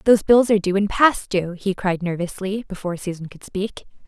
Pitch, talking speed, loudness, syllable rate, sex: 195 Hz, 205 wpm, -21 LUFS, 5.5 syllables/s, female